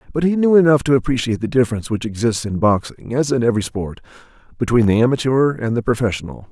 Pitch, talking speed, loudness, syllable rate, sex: 120 Hz, 205 wpm, -18 LUFS, 6.9 syllables/s, male